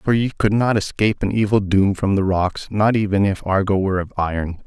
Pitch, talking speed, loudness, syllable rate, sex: 100 Hz, 230 wpm, -19 LUFS, 5.7 syllables/s, male